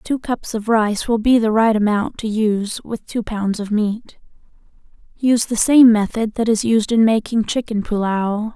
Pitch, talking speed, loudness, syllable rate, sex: 220 Hz, 190 wpm, -18 LUFS, 4.5 syllables/s, female